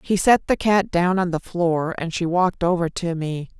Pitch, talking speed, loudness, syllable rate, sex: 175 Hz, 235 wpm, -21 LUFS, 4.7 syllables/s, female